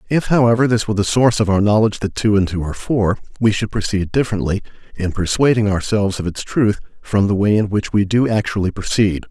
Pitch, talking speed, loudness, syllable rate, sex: 105 Hz, 220 wpm, -17 LUFS, 6.3 syllables/s, male